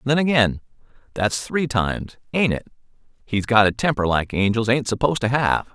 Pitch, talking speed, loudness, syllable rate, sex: 120 Hz, 155 wpm, -21 LUFS, 5.3 syllables/s, male